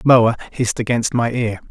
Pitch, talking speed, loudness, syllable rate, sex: 115 Hz, 175 wpm, -18 LUFS, 5.1 syllables/s, male